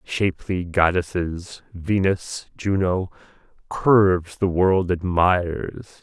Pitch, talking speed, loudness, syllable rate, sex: 90 Hz, 80 wpm, -21 LUFS, 3.3 syllables/s, male